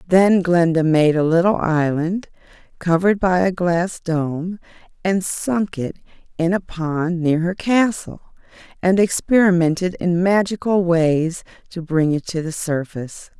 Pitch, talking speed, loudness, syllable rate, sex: 175 Hz, 140 wpm, -19 LUFS, 4.0 syllables/s, female